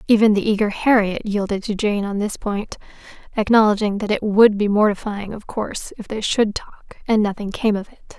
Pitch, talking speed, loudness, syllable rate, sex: 210 Hz, 200 wpm, -19 LUFS, 5.3 syllables/s, female